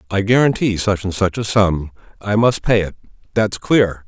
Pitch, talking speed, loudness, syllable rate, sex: 100 Hz, 175 wpm, -17 LUFS, 4.8 syllables/s, male